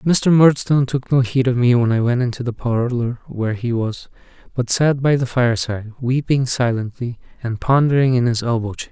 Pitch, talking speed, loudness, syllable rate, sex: 125 Hz, 195 wpm, -18 LUFS, 5.3 syllables/s, male